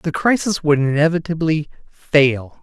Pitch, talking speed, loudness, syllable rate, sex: 155 Hz, 115 wpm, -17 LUFS, 4.2 syllables/s, male